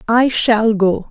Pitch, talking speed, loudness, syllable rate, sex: 220 Hz, 165 wpm, -14 LUFS, 3.2 syllables/s, female